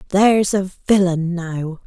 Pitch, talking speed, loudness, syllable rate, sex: 185 Hz, 130 wpm, -18 LUFS, 3.8 syllables/s, female